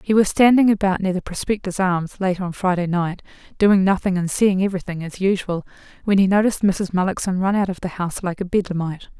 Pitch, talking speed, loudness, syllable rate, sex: 190 Hz, 210 wpm, -20 LUFS, 6.1 syllables/s, female